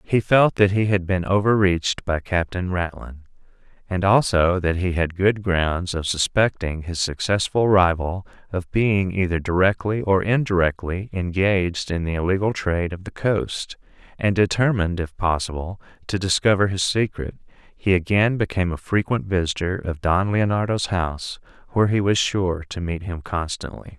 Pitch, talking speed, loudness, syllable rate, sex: 95 Hz, 155 wpm, -21 LUFS, 4.8 syllables/s, male